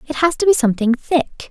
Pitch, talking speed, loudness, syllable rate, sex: 285 Hz, 240 wpm, -17 LUFS, 5.8 syllables/s, female